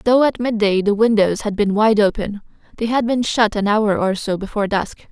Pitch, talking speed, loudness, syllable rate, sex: 215 Hz, 225 wpm, -18 LUFS, 5.2 syllables/s, female